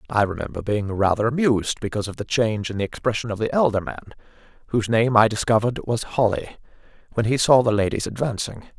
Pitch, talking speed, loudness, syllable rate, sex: 110 Hz, 190 wpm, -22 LUFS, 6.6 syllables/s, male